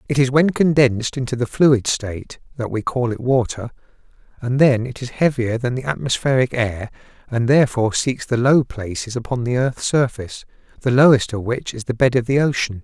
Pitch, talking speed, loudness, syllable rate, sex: 125 Hz, 195 wpm, -19 LUFS, 5.5 syllables/s, male